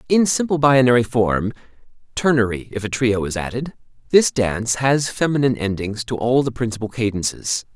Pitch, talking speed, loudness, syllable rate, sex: 120 Hz, 140 wpm, -19 LUFS, 5.4 syllables/s, male